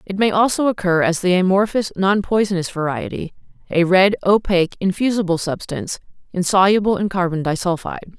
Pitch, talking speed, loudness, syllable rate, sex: 185 Hz, 140 wpm, -18 LUFS, 5.8 syllables/s, female